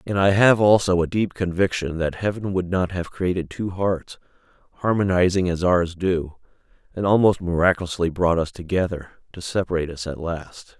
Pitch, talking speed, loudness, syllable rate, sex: 90 Hz, 165 wpm, -22 LUFS, 5.2 syllables/s, male